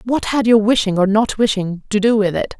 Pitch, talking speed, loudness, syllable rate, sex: 210 Hz, 255 wpm, -16 LUFS, 5.4 syllables/s, female